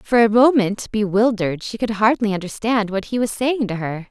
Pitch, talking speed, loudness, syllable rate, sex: 215 Hz, 205 wpm, -19 LUFS, 5.2 syllables/s, female